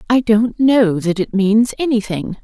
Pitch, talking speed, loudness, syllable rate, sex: 220 Hz, 175 wpm, -15 LUFS, 4.2 syllables/s, female